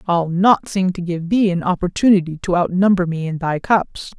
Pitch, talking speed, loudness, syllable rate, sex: 180 Hz, 200 wpm, -17 LUFS, 5.0 syllables/s, female